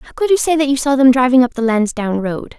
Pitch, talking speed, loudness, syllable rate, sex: 260 Hz, 300 wpm, -14 LUFS, 5.9 syllables/s, female